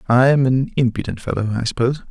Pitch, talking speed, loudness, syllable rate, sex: 125 Hz, 200 wpm, -18 LUFS, 6.7 syllables/s, male